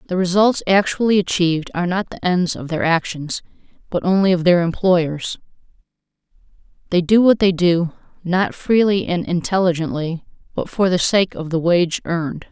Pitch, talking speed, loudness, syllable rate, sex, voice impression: 180 Hz, 160 wpm, -18 LUFS, 5.0 syllables/s, female, feminine, very adult-like, intellectual, elegant, slightly strict